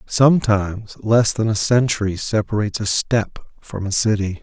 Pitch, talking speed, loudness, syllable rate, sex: 105 Hz, 150 wpm, -19 LUFS, 5.1 syllables/s, male